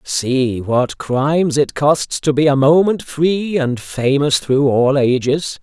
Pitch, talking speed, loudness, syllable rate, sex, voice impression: 140 Hz, 160 wpm, -16 LUFS, 3.4 syllables/s, male, masculine, adult-like, slightly middle-aged, thick, tensed, slightly powerful, slightly bright, slightly soft, slightly muffled, fluent, cool, slightly intellectual, slightly refreshing, slightly sincere, calm, slightly mature, friendly, slightly reassuring, wild, slightly lively, kind, slightly light